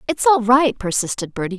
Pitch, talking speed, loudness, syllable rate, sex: 230 Hz, 190 wpm, -18 LUFS, 5.6 syllables/s, female